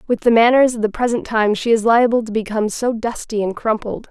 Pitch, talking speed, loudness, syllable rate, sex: 225 Hz, 235 wpm, -17 LUFS, 5.8 syllables/s, female